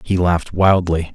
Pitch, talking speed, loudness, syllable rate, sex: 90 Hz, 155 wpm, -16 LUFS, 4.8 syllables/s, male